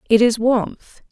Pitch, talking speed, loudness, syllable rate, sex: 230 Hz, 160 wpm, -17 LUFS, 3.5 syllables/s, female